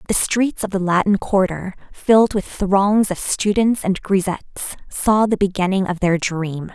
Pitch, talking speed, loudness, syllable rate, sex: 195 Hz, 170 wpm, -18 LUFS, 4.6 syllables/s, female